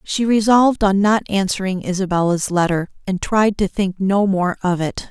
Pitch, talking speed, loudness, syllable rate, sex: 195 Hz, 175 wpm, -18 LUFS, 4.8 syllables/s, female